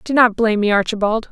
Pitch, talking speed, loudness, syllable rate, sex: 220 Hz, 230 wpm, -16 LUFS, 6.6 syllables/s, female